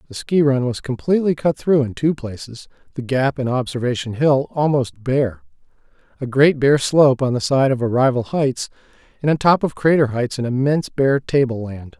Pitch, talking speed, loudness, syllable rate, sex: 135 Hz, 190 wpm, -18 LUFS, 5.2 syllables/s, male